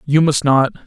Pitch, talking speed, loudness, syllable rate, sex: 140 Hz, 210 wpm, -15 LUFS, 5.0 syllables/s, male